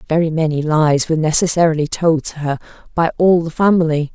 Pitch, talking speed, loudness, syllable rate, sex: 160 Hz, 160 wpm, -16 LUFS, 5.6 syllables/s, female